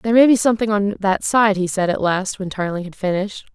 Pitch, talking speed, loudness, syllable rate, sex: 200 Hz, 255 wpm, -18 LUFS, 6.1 syllables/s, female